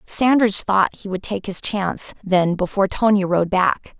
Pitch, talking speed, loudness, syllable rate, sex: 195 Hz, 180 wpm, -19 LUFS, 4.8 syllables/s, female